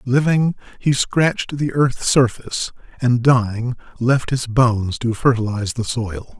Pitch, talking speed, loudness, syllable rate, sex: 125 Hz, 140 wpm, -19 LUFS, 4.4 syllables/s, male